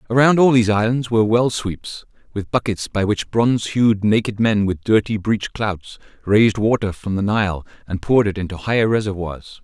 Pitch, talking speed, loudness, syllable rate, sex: 105 Hz, 185 wpm, -18 LUFS, 5.2 syllables/s, male